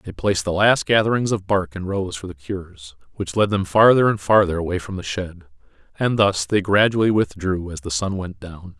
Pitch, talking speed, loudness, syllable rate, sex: 95 Hz, 220 wpm, -20 LUFS, 5.3 syllables/s, male